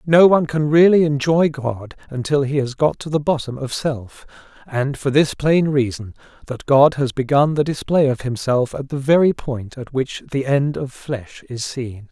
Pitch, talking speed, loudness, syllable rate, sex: 140 Hz, 200 wpm, -18 LUFS, 4.6 syllables/s, male